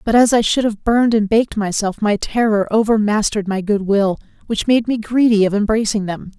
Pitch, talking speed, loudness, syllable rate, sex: 215 Hz, 205 wpm, -16 LUFS, 5.6 syllables/s, female